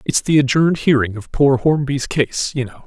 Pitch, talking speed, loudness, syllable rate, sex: 135 Hz, 210 wpm, -17 LUFS, 5.2 syllables/s, male